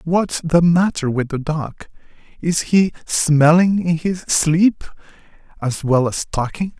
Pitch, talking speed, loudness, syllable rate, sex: 160 Hz, 130 wpm, -17 LUFS, 3.5 syllables/s, male